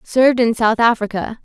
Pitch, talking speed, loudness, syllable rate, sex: 230 Hz, 165 wpm, -16 LUFS, 5.3 syllables/s, female